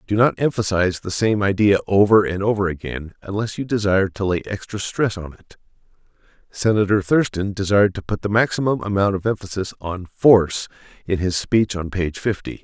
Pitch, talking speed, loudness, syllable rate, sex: 100 Hz, 175 wpm, -20 LUFS, 5.5 syllables/s, male